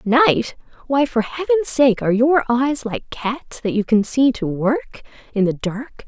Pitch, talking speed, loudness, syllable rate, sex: 245 Hz, 180 wpm, -19 LUFS, 4.0 syllables/s, female